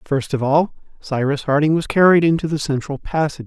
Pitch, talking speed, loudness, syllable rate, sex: 150 Hz, 190 wpm, -18 LUFS, 5.7 syllables/s, male